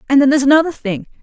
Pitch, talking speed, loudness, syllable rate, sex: 275 Hz, 245 wpm, -14 LUFS, 8.9 syllables/s, female